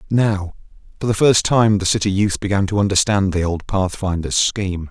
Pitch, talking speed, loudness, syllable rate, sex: 100 Hz, 185 wpm, -18 LUFS, 5.2 syllables/s, male